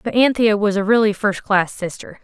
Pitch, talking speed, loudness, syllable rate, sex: 210 Hz, 190 wpm, -17 LUFS, 5.2 syllables/s, female